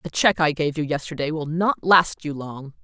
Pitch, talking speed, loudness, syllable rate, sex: 155 Hz, 235 wpm, -22 LUFS, 4.9 syllables/s, female